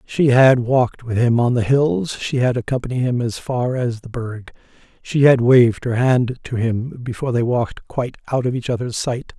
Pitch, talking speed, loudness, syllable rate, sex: 120 Hz, 210 wpm, -18 LUFS, 5.0 syllables/s, male